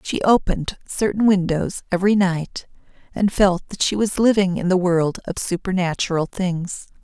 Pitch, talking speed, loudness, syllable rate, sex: 185 Hz, 155 wpm, -20 LUFS, 4.8 syllables/s, female